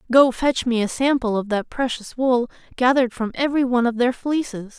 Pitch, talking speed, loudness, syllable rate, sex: 245 Hz, 200 wpm, -21 LUFS, 5.7 syllables/s, female